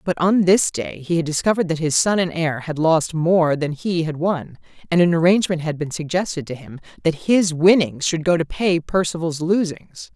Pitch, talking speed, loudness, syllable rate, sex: 165 Hz, 215 wpm, -19 LUFS, 5.1 syllables/s, female